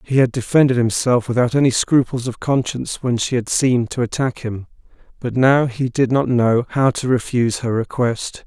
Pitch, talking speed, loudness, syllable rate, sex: 125 Hz, 190 wpm, -18 LUFS, 5.1 syllables/s, male